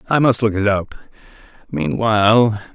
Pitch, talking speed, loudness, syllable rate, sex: 110 Hz, 130 wpm, -16 LUFS, 4.4 syllables/s, male